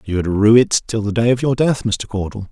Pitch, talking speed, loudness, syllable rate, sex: 110 Hz, 260 wpm, -16 LUFS, 5.1 syllables/s, male